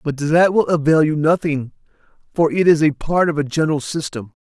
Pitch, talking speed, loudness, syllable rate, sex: 155 Hz, 205 wpm, -17 LUFS, 5.5 syllables/s, male